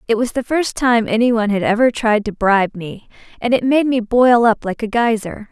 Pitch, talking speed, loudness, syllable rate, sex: 225 Hz, 230 wpm, -16 LUFS, 5.2 syllables/s, female